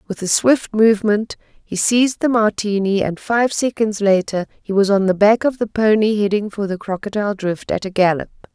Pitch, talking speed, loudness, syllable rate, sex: 205 Hz, 195 wpm, -17 LUFS, 5.2 syllables/s, female